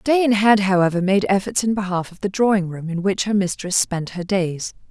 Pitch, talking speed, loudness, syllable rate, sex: 195 Hz, 220 wpm, -19 LUFS, 5.1 syllables/s, female